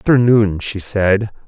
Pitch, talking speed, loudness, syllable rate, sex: 105 Hz, 120 wpm, -15 LUFS, 3.9 syllables/s, male